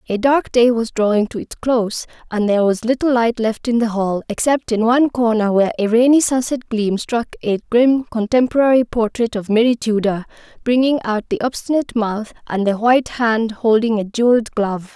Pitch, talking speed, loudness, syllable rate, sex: 230 Hz, 190 wpm, -17 LUFS, 5.4 syllables/s, female